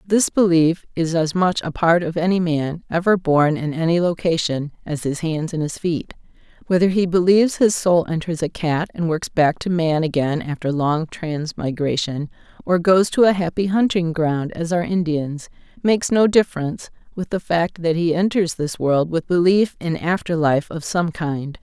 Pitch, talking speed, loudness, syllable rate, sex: 170 Hz, 185 wpm, -19 LUFS, 4.7 syllables/s, female